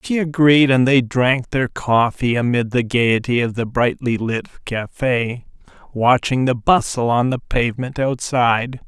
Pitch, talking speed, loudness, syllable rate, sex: 125 Hz, 150 wpm, -18 LUFS, 4.2 syllables/s, male